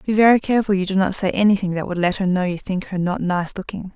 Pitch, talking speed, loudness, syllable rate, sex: 190 Hz, 290 wpm, -20 LUFS, 6.5 syllables/s, female